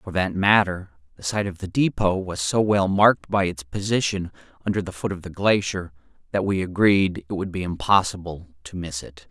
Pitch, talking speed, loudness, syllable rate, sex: 90 Hz, 200 wpm, -23 LUFS, 5.2 syllables/s, male